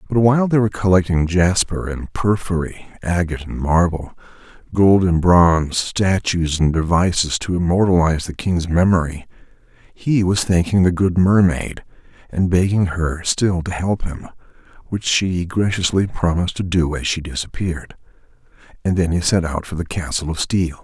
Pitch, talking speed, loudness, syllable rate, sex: 90 Hz, 155 wpm, -18 LUFS, 4.9 syllables/s, male